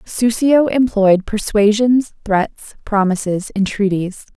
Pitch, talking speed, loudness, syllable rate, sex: 210 Hz, 80 wpm, -16 LUFS, 3.5 syllables/s, female